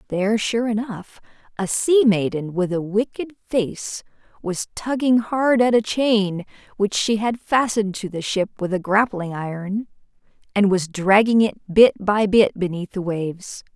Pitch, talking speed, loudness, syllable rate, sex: 205 Hz, 160 wpm, -20 LUFS, 4.3 syllables/s, female